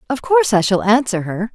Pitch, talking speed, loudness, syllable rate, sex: 205 Hz, 235 wpm, -16 LUFS, 5.9 syllables/s, female